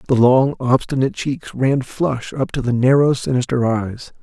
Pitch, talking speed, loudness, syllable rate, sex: 130 Hz, 170 wpm, -18 LUFS, 4.6 syllables/s, male